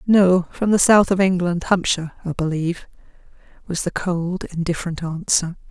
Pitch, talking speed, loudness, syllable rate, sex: 175 Hz, 135 wpm, -20 LUFS, 5.1 syllables/s, female